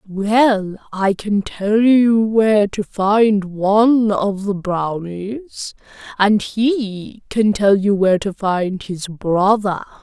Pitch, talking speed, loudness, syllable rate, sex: 205 Hz, 130 wpm, -17 LUFS, 3.0 syllables/s, female